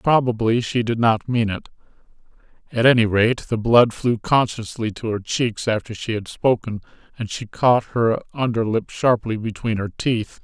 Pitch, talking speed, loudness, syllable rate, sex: 115 Hz, 175 wpm, -20 LUFS, 4.5 syllables/s, male